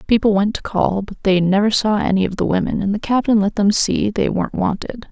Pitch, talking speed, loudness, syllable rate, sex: 205 Hz, 245 wpm, -18 LUFS, 5.7 syllables/s, female